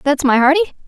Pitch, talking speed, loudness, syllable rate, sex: 295 Hz, 205 wpm, -14 LUFS, 7.7 syllables/s, female